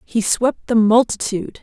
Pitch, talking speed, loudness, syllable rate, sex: 225 Hz, 150 wpm, -17 LUFS, 4.6 syllables/s, female